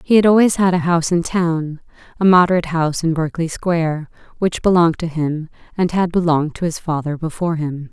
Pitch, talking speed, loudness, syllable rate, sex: 165 Hz, 190 wpm, -17 LUFS, 6.1 syllables/s, female